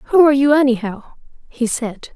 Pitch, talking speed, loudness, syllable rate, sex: 255 Hz, 165 wpm, -16 LUFS, 5.1 syllables/s, female